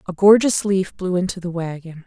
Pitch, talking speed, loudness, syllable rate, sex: 180 Hz, 205 wpm, -19 LUFS, 5.3 syllables/s, female